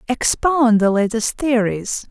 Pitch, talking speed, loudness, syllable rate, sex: 235 Hz, 115 wpm, -17 LUFS, 3.6 syllables/s, female